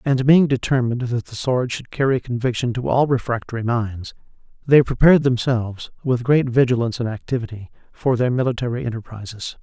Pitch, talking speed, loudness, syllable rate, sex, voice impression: 120 Hz, 155 wpm, -20 LUFS, 5.8 syllables/s, male, masculine, adult-like, slightly cool, sincere, calm, slightly sweet